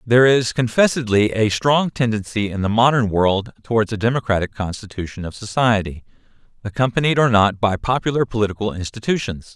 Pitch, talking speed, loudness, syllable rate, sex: 110 Hz, 145 wpm, -19 LUFS, 5.7 syllables/s, male